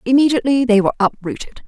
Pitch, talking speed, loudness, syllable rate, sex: 235 Hz, 145 wpm, -15 LUFS, 7.5 syllables/s, female